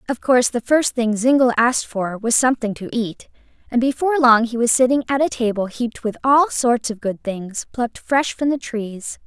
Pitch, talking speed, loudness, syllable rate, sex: 240 Hz, 215 wpm, -19 LUFS, 5.2 syllables/s, female